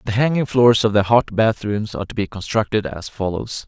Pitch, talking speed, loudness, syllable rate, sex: 105 Hz, 230 wpm, -19 LUFS, 5.4 syllables/s, male